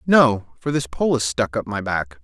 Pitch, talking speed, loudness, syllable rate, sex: 120 Hz, 240 wpm, -21 LUFS, 4.4 syllables/s, male